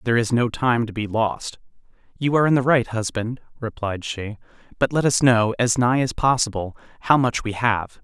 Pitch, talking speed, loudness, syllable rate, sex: 115 Hz, 200 wpm, -21 LUFS, 5.2 syllables/s, male